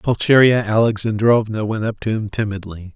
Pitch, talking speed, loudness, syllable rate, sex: 110 Hz, 140 wpm, -17 LUFS, 5.2 syllables/s, male